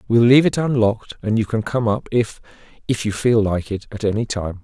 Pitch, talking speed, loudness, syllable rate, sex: 110 Hz, 220 wpm, -19 LUFS, 5.7 syllables/s, male